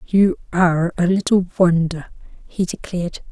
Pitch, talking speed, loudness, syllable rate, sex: 180 Hz, 125 wpm, -19 LUFS, 4.7 syllables/s, female